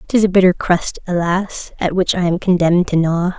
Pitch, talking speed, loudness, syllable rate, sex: 180 Hz, 215 wpm, -16 LUFS, 5.1 syllables/s, female